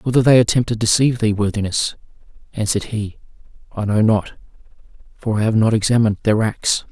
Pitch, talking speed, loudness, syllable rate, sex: 110 Hz, 165 wpm, -18 LUFS, 6.1 syllables/s, male